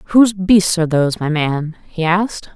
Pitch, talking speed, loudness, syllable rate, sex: 175 Hz, 190 wpm, -16 LUFS, 5.0 syllables/s, female